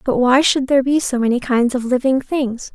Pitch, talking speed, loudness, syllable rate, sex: 255 Hz, 240 wpm, -17 LUFS, 5.3 syllables/s, female